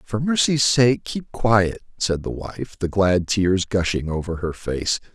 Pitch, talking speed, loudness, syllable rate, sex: 105 Hz, 175 wpm, -21 LUFS, 3.8 syllables/s, male